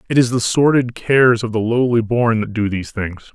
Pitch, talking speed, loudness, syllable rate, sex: 115 Hz, 235 wpm, -17 LUFS, 5.4 syllables/s, male